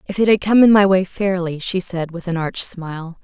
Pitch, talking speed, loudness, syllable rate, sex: 185 Hz, 260 wpm, -17 LUFS, 5.2 syllables/s, female